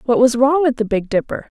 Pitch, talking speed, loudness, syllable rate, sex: 250 Hz, 265 wpm, -16 LUFS, 5.8 syllables/s, female